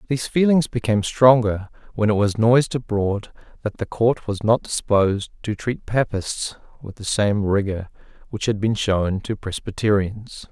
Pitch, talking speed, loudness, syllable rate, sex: 110 Hz, 160 wpm, -21 LUFS, 4.7 syllables/s, male